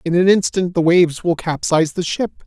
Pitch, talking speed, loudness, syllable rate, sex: 170 Hz, 220 wpm, -17 LUFS, 5.8 syllables/s, male